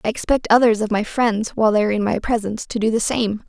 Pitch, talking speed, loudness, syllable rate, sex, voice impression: 220 Hz, 275 wpm, -19 LUFS, 6.7 syllables/s, female, very feminine, slightly young, slightly adult-like, very thin, relaxed, weak, slightly bright, soft, slightly muffled, fluent, raspy, very cute, intellectual, slightly refreshing, sincere, very calm, very friendly, very reassuring, very unique, elegant, wild, very sweet, slightly lively, very kind, slightly intense, modest